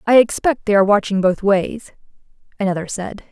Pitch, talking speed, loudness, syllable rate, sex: 205 Hz, 165 wpm, -17 LUFS, 5.7 syllables/s, female